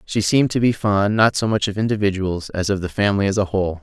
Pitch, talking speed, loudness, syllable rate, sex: 100 Hz, 265 wpm, -19 LUFS, 6.5 syllables/s, male